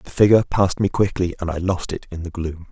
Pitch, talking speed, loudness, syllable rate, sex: 90 Hz, 265 wpm, -20 LUFS, 6.2 syllables/s, male